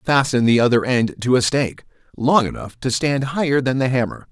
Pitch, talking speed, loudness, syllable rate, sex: 125 Hz, 210 wpm, -18 LUFS, 5.5 syllables/s, male